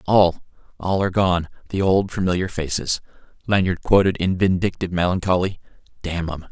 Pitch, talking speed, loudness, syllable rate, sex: 90 Hz, 130 wpm, -21 LUFS, 5.5 syllables/s, male